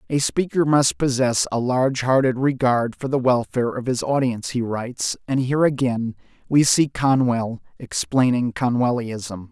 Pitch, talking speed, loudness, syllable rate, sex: 125 Hz, 150 wpm, -21 LUFS, 4.7 syllables/s, male